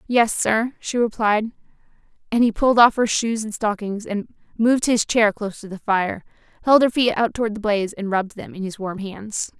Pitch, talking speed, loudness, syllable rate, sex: 215 Hz, 215 wpm, -20 LUFS, 5.3 syllables/s, female